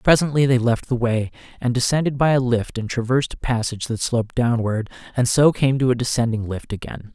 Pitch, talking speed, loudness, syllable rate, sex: 125 Hz, 210 wpm, -20 LUFS, 5.9 syllables/s, male